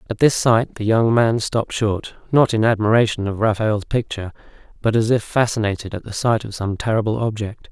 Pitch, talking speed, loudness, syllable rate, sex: 110 Hz, 195 wpm, -19 LUFS, 5.6 syllables/s, male